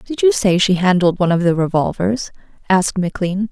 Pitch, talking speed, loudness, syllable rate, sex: 190 Hz, 190 wpm, -16 LUFS, 5.9 syllables/s, female